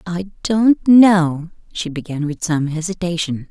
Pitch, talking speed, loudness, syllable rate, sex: 175 Hz, 135 wpm, -17 LUFS, 4.0 syllables/s, female